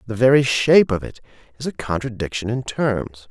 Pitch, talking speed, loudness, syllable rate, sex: 120 Hz, 180 wpm, -19 LUFS, 5.5 syllables/s, male